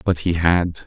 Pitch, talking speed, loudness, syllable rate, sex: 85 Hz, 210 wpm, -19 LUFS, 3.9 syllables/s, male